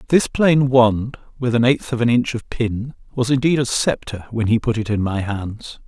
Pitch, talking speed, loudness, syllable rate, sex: 120 Hz, 225 wpm, -19 LUFS, 4.6 syllables/s, male